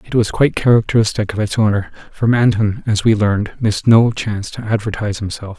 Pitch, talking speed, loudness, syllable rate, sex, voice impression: 110 Hz, 195 wpm, -16 LUFS, 6.2 syllables/s, male, masculine, adult-like, slightly muffled, sincere, calm, kind